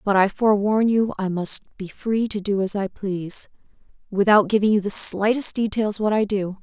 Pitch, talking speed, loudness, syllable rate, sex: 205 Hz, 200 wpm, -21 LUFS, 5.1 syllables/s, female